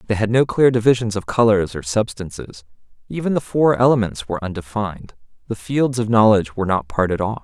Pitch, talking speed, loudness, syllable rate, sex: 105 Hz, 185 wpm, -18 LUFS, 6.0 syllables/s, male